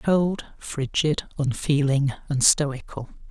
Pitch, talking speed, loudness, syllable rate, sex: 145 Hz, 90 wpm, -23 LUFS, 3.3 syllables/s, male